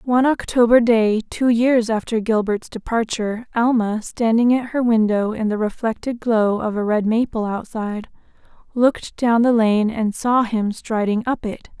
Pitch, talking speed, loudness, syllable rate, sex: 225 Hz, 165 wpm, -19 LUFS, 4.6 syllables/s, female